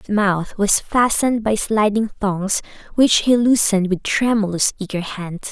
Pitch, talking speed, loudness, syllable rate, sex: 210 Hz, 150 wpm, -18 LUFS, 4.3 syllables/s, female